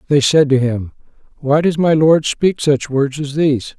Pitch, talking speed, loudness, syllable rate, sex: 145 Hz, 205 wpm, -15 LUFS, 4.5 syllables/s, male